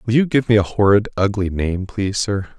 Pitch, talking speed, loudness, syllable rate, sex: 105 Hz, 230 wpm, -18 LUFS, 5.4 syllables/s, male